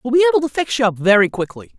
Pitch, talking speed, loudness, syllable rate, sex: 225 Hz, 305 wpm, -16 LUFS, 7.6 syllables/s, female